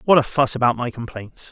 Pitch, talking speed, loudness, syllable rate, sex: 125 Hz, 240 wpm, -19 LUFS, 5.8 syllables/s, male